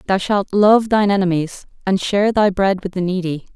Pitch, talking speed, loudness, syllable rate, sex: 195 Hz, 205 wpm, -17 LUFS, 5.5 syllables/s, female